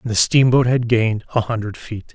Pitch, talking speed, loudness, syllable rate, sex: 115 Hz, 225 wpm, -17 LUFS, 5.5 syllables/s, male